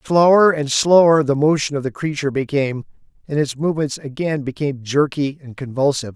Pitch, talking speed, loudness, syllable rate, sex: 145 Hz, 165 wpm, -18 LUFS, 5.9 syllables/s, male